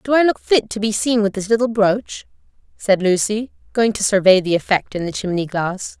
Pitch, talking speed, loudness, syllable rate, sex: 205 Hz, 220 wpm, -18 LUFS, 5.2 syllables/s, female